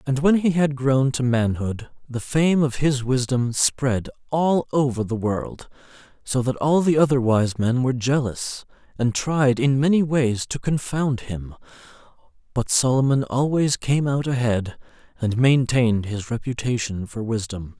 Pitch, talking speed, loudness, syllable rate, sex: 130 Hz, 155 wpm, -21 LUFS, 4.3 syllables/s, male